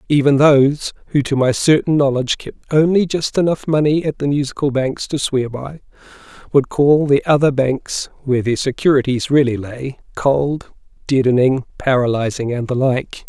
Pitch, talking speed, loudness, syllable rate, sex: 135 Hz, 160 wpm, -16 LUFS, 4.3 syllables/s, male